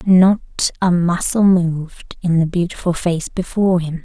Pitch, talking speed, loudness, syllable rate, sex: 175 Hz, 150 wpm, -17 LUFS, 4.6 syllables/s, female